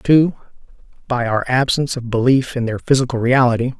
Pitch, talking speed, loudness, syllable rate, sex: 125 Hz, 160 wpm, -17 LUFS, 6.3 syllables/s, male